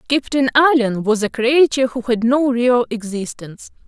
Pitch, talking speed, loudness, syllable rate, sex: 245 Hz, 155 wpm, -16 LUFS, 4.9 syllables/s, female